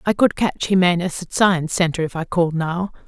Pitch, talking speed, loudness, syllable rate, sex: 175 Hz, 215 wpm, -19 LUFS, 5.6 syllables/s, female